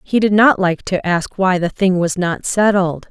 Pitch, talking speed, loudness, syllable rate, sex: 185 Hz, 230 wpm, -16 LUFS, 4.3 syllables/s, female